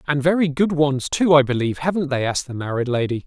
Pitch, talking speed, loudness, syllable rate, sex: 145 Hz, 240 wpm, -20 LUFS, 6.4 syllables/s, male